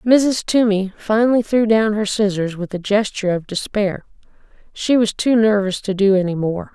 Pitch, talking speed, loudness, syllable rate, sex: 210 Hz, 180 wpm, -18 LUFS, 4.9 syllables/s, female